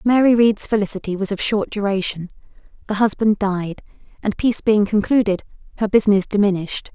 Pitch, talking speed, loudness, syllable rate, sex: 205 Hz, 155 wpm, -19 LUFS, 6.0 syllables/s, female